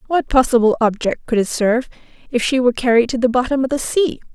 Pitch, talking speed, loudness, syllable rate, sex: 250 Hz, 220 wpm, -17 LUFS, 6.2 syllables/s, female